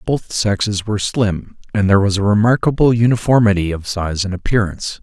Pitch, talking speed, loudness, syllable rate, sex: 105 Hz, 165 wpm, -16 LUFS, 5.7 syllables/s, male